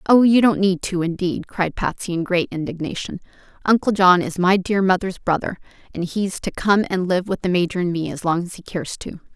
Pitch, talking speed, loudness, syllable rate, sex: 180 Hz, 225 wpm, -20 LUFS, 5.5 syllables/s, female